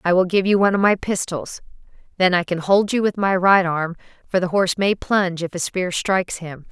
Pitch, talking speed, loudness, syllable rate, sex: 185 Hz, 240 wpm, -19 LUFS, 5.6 syllables/s, female